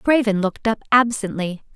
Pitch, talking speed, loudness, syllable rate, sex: 215 Hz, 135 wpm, -20 LUFS, 5.4 syllables/s, female